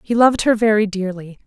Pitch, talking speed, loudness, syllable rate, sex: 210 Hz, 205 wpm, -17 LUFS, 6.1 syllables/s, female